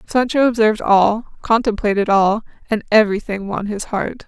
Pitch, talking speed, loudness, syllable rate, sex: 215 Hz, 140 wpm, -17 LUFS, 5.3 syllables/s, female